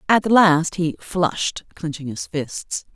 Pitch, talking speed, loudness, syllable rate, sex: 160 Hz, 160 wpm, -21 LUFS, 3.9 syllables/s, female